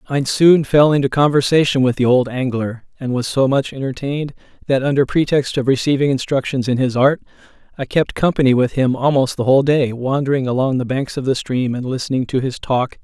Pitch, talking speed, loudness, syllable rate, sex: 135 Hz, 205 wpm, -17 LUFS, 5.6 syllables/s, male